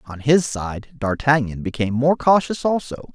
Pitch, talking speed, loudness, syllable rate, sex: 135 Hz, 155 wpm, -20 LUFS, 4.7 syllables/s, male